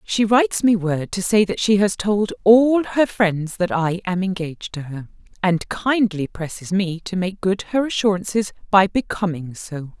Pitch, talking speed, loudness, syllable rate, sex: 195 Hz, 185 wpm, -20 LUFS, 4.5 syllables/s, female